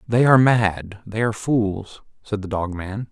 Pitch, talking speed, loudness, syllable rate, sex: 105 Hz, 190 wpm, -20 LUFS, 4.4 syllables/s, male